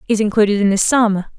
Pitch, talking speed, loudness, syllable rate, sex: 210 Hz, 215 wpm, -15 LUFS, 6.2 syllables/s, female